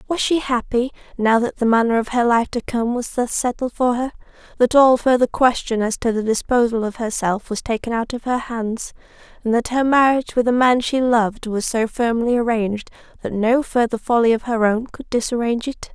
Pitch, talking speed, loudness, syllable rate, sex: 235 Hz, 210 wpm, -19 LUFS, 5.4 syllables/s, female